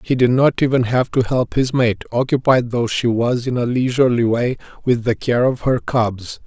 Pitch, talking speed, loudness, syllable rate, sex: 125 Hz, 215 wpm, -17 LUFS, 4.9 syllables/s, male